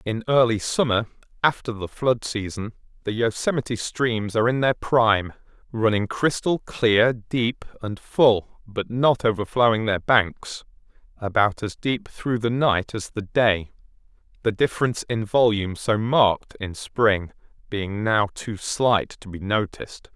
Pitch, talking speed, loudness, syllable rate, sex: 110 Hz, 145 wpm, -22 LUFS, 4.2 syllables/s, male